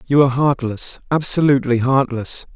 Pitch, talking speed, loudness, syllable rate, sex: 130 Hz, 95 wpm, -17 LUFS, 5.4 syllables/s, male